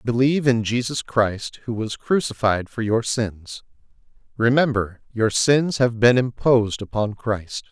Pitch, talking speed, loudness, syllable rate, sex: 115 Hz, 140 wpm, -21 LUFS, 4.2 syllables/s, male